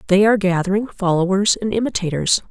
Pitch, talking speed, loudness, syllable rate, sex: 195 Hz, 145 wpm, -18 LUFS, 6.2 syllables/s, female